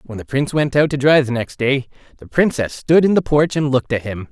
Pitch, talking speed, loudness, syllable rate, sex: 135 Hz, 265 wpm, -17 LUFS, 5.9 syllables/s, male